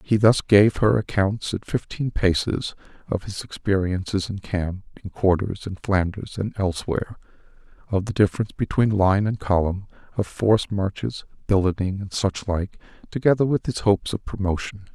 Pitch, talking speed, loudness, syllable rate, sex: 100 Hz, 155 wpm, -23 LUFS, 5.1 syllables/s, male